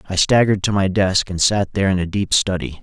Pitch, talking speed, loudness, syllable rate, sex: 95 Hz, 255 wpm, -17 LUFS, 6.2 syllables/s, male